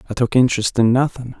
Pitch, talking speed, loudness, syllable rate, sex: 125 Hz, 215 wpm, -17 LUFS, 6.9 syllables/s, male